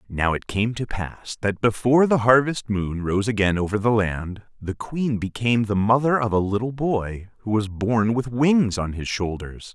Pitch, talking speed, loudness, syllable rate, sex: 110 Hz, 195 wpm, -22 LUFS, 4.6 syllables/s, male